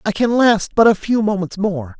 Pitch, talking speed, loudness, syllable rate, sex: 200 Hz, 240 wpm, -16 LUFS, 5.0 syllables/s, female